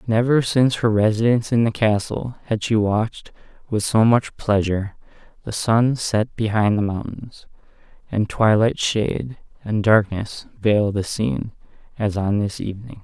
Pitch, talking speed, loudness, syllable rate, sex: 110 Hz, 145 wpm, -20 LUFS, 4.6 syllables/s, male